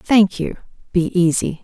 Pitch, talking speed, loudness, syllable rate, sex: 185 Hz, 145 wpm, -18 LUFS, 4.1 syllables/s, female